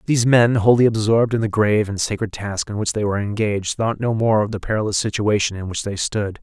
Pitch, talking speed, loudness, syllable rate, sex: 105 Hz, 245 wpm, -19 LUFS, 6.2 syllables/s, male